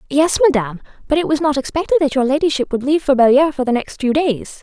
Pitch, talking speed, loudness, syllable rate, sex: 280 Hz, 245 wpm, -16 LUFS, 6.8 syllables/s, female